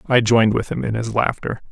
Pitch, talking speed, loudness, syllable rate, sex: 115 Hz, 245 wpm, -19 LUFS, 6.0 syllables/s, male